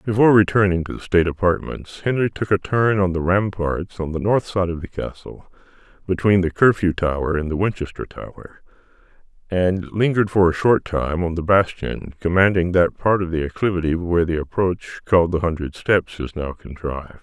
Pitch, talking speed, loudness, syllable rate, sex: 90 Hz, 185 wpm, -20 LUFS, 5.3 syllables/s, male